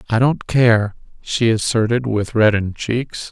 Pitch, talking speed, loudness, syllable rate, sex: 115 Hz, 145 wpm, -17 LUFS, 4.2 syllables/s, male